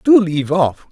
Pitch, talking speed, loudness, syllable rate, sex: 175 Hz, 195 wpm, -15 LUFS, 5.0 syllables/s, male